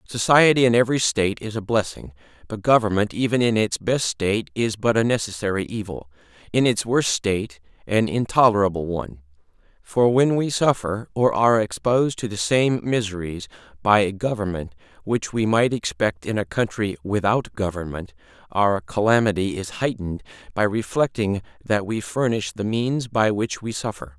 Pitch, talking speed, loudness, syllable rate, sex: 105 Hz, 160 wpm, -22 LUFS, 5.1 syllables/s, male